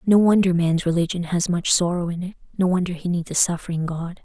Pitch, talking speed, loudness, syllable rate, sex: 175 Hz, 225 wpm, -21 LUFS, 5.9 syllables/s, female